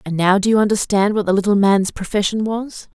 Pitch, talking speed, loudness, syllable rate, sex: 205 Hz, 220 wpm, -17 LUFS, 5.7 syllables/s, female